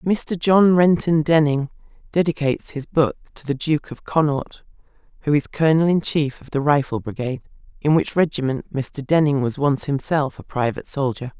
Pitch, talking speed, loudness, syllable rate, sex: 150 Hz, 170 wpm, -20 LUFS, 5.2 syllables/s, female